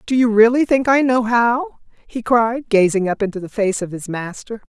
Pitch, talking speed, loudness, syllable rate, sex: 225 Hz, 215 wpm, -17 LUFS, 4.8 syllables/s, female